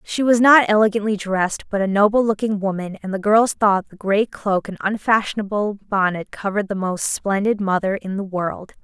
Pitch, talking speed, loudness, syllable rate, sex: 205 Hz, 190 wpm, -19 LUFS, 5.2 syllables/s, female